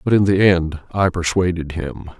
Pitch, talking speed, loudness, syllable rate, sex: 90 Hz, 190 wpm, -18 LUFS, 5.1 syllables/s, male